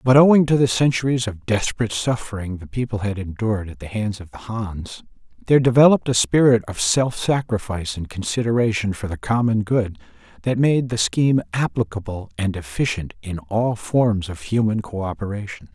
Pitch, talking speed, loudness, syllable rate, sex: 110 Hz, 170 wpm, -20 LUFS, 5.5 syllables/s, male